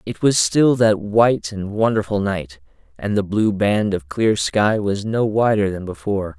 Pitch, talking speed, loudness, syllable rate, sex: 105 Hz, 190 wpm, -19 LUFS, 4.4 syllables/s, male